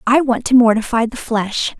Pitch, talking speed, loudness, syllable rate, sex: 235 Hz, 200 wpm, -15 LUFS, 5.0 syllables/s, female